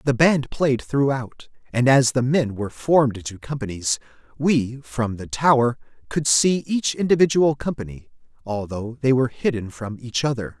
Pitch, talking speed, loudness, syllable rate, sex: 130 Hz, 160 wpm, -21 LUFS, 4.8 syllables/s, male